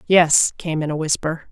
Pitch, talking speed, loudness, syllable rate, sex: 160 Hz, 200 wpm, -18 LUFS, 4.6 syllables/s, female